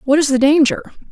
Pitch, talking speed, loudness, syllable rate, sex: 290 Hz, 215 wpm, -14 LUFS, 6.7 syllables/s, female